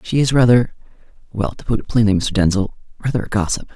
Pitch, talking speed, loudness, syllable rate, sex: 110 Hz, 175 wpm, -18 LUFS, 6.3 syllables/s, male